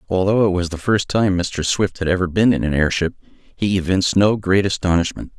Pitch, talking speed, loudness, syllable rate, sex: 95 Hz, 210 wpm, -18 LUFS, 5.5 syllables/s, male